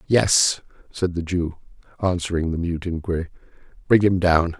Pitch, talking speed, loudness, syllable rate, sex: 85 Hz, 145 wpm, -21 LUFS, 4.8 syllables/s, male